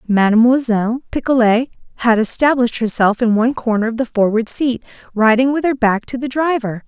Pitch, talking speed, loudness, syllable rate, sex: 235 Hz, 165 wpm, -16 LUFS, 5.7 syllables/s, female